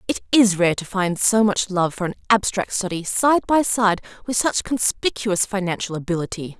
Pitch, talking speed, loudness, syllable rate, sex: 200 Hz, 180 wpm, -20 LUFS, 4.9 syllables/s, female